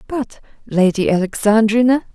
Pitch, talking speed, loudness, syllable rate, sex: 220 Hz, 85 wpm, -16 LUFS, 4.8 syllables/s, female